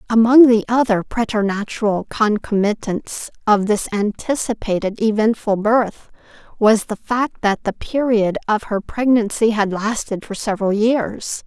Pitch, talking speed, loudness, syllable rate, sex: 215 Hz, 125 wpm, -18 LUFS, 4.3 syllables/s, female